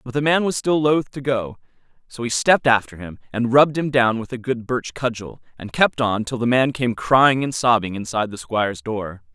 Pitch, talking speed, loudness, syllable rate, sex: 120 Hz, 230 wpm, -20 LUFS, 5.2 syllables/s, male